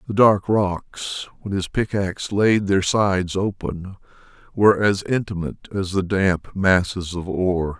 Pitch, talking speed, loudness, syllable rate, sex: 95 Hz, 145 wpm, -21 LUFS, 4.5 syllables/s, male